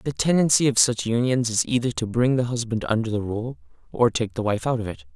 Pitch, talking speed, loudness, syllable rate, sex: 120 Hz, 245 wpm, -22 LUFS, 5.8 syllables/s, male